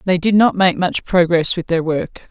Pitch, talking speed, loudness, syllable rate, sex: 175 Hz, 235 wpm, -16 LUFS, 4.6 syllables/s, female